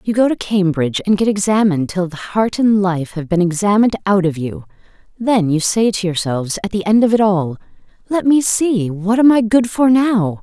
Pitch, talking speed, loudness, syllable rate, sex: 200 Hz, 220 wpm, -15 LUFS, 5.3 syllables/s, female